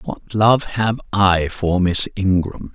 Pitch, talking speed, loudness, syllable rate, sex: 95 Hz, 155 wpm, -18 LUFS, 3.2 syllables/s, male